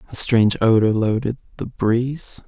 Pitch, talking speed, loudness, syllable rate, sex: 115 Hz, 145 wpm, -19 LUFS, 5.1 syllables/s, male